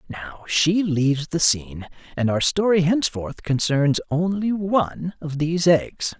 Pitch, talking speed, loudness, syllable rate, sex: 155 Hz, 145 wpm, -21 LUFS, 4.3 syllables/s, male